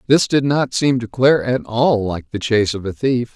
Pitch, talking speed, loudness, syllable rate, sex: 120 Hz, 250 wpm, -17 LUFS, 5.1 syllables/s, male